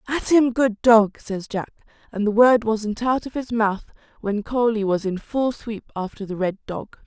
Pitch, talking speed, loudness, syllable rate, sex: 220 Hz, 205 wpm, -21 LUFS, 4.3 syllables/s, female